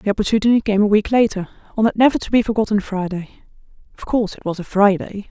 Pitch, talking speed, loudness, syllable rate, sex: 210 Hz, 215 wpm, -18 LUFS, 7.0 syllables/s, female